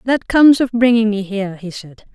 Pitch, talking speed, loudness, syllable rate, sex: 220 Hz, 225 wpm, -14 LUFS, 5.8 syllables/s, female